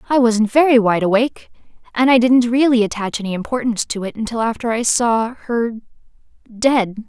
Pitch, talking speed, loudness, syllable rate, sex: 230 Hz, 160 wpm, -17 LUFS, 5.5 syllables/s, female